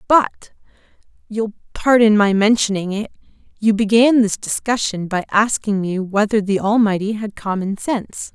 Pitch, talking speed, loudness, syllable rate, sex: 210 Hz, 120 wpm, -17 LUFS, 4.6 syllables/s, female